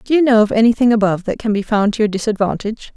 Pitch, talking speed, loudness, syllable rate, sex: 220 Hz, 285 wpm, -16 LUFS, 7.4 syllables/s, female